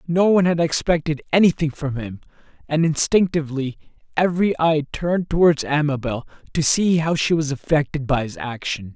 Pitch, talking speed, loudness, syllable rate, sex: 150 Hz, 155 wpm, -20 LUFS, 5.5 syllables/s, male